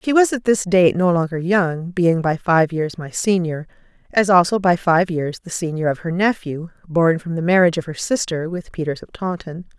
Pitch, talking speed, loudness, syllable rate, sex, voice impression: 175 Hz, 215 wpm, -19 LUFS, 5.0 syllables/s, female, very feminine, slightly young, slightly adult-like, very thin, tensed, slightly powerful, bright, hard, very clear, very fluent, cool, intellectual, very refreshing, sincere, very calm, friendly, reassuring, very unique, elegant, slightly wild, sweet, very lively, strict, slightly intense, sharp, slightly light